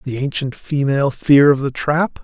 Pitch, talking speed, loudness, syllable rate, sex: 140 Hz, 190 wpm, -16 LUFS, 4.7 syllables/s, male